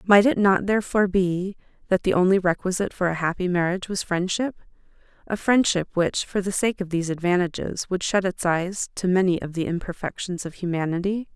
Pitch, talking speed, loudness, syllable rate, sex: 185 Hz, 180 wpm, -23 LUFS, 5.7 syllables/s, female